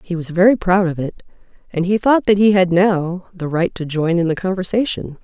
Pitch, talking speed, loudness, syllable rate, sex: 185 Hz, 230 wpm, -17 LUFS, 5.3 syllables/s, female